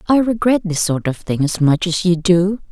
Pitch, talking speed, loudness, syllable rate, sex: 180 Hz, 245 wpm, -16 LUFS, 4.9 syllables/s, female